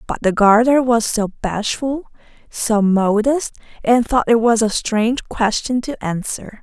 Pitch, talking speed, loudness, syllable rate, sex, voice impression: 230 Hz, 155 wpm, -17 LUFS, 4.0 syllables/s, female, feminine, adult-like, tensed, slightly powerful, bright, halting, friendly, unique, intense